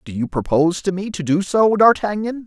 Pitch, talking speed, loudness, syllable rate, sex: 185 Hz, 220 wpm, -18 LUFS, 5.5 syllables/s, male